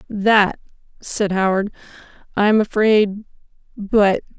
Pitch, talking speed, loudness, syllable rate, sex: 205 Hz, 80 wpm, -18 LUFS, 3.7 syllables/s, female